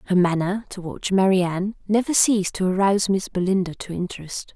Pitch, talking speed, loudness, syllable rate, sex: 190 Hz, 170 wpm, -22 LUFS, 6.0 syllables/s, female